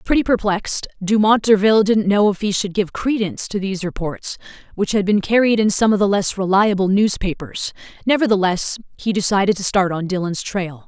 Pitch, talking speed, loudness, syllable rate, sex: 200 Hz, 180 wpm, -18 LUFS, 5.5 syllables/s, female